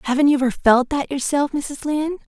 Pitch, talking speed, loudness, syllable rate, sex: 280 Hz, 205 wpm, -19 LUFS, 5.7 syllables/s, female